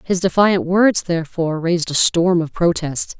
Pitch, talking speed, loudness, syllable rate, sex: 175 Hz, 170 wpm, -17 LUFS, 4.9 syllables/s, female